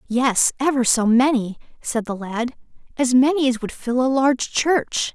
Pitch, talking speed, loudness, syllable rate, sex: 250 Hz, 175 wpm, -19 LUFS, 4.4 syllables/s, female